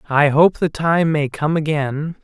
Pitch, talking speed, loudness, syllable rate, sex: 155 Hz, 190 wpm, -17 LUFS, 4.0 syllables/s, male